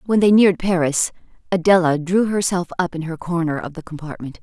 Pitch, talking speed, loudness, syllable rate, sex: 175 Hz, 190 wpm, -18 LUFS, 5.8 syllables/s, female